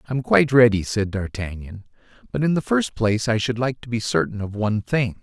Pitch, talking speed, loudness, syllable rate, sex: 115 Hz, 230 wpm, -21 LUFS, 5.9 syllables/s, male